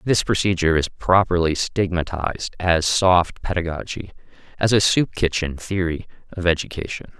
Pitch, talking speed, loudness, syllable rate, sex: 90 Hz, 125 wpm, -20 LUFS, 4.9 syllables/s, male